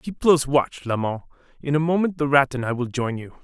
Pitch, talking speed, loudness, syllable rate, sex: 140 Hz, 260 wpm, -22 LUFS, 5.8 syllables/s, male